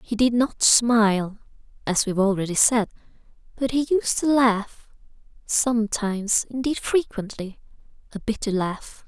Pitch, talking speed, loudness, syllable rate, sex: 225 Hz, 130 wpm, -22 LUFS, 4.5 syllables/s, female